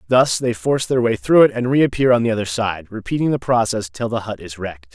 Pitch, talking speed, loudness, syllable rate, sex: 115 Hz, 255 wpm, -18 LUFS, 5.9 syllables/s, male